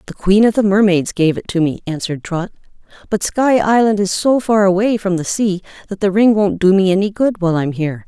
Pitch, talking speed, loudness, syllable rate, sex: 195 Hz, 240 wpm, -15 LUFS, 5.7 syllables/s, female